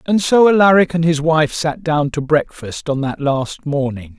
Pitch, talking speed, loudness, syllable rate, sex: 155 Hz, 200 wpm, -16 LUFS, 4.4 syllables/s, male